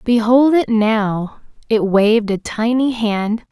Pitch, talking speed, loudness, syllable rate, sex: 225 Hz, 135 wpm, -16 LUFS, 3.5 syllables/s, female